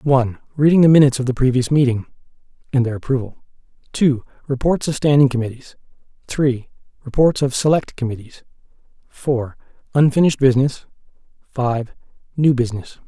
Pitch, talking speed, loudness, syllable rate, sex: 130 Hz, 125 wpm, -18 LUFS, 7.0 syllables/s, male